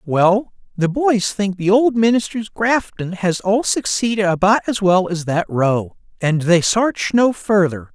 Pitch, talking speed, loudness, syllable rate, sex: 200 Hz, 165 wpm, -17 LUFS, 4.0 syllables/s, male